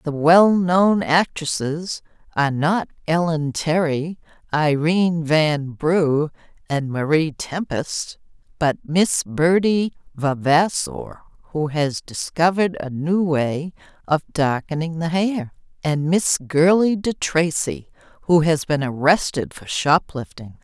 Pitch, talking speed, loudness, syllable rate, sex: 160 Hz, 115 wpm, -20 LUFS, 3.6 syllables/s, female